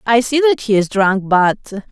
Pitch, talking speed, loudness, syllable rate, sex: 220 Hz, 220 wpm, -14 LUFS, 4.2 syllables/s, female